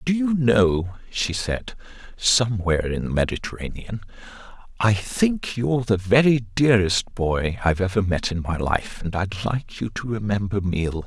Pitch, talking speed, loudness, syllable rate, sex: 105 Hz, 175 wpm, -22 LUFS, 4.9 syllables/s, male